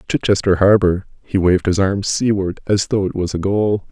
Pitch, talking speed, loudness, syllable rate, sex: 95 Hz, 200 wpm, -17 LUFS, 5.1 syllables/s, male